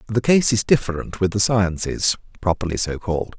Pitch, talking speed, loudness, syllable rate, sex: 100 Hz, 175 wpm, -20 LUFS, 5.4 syllables/s, male